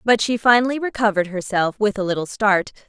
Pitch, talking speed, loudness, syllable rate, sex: 210 Hz, 190 wpm, -19 LUFS, 6.2 syllables/s, female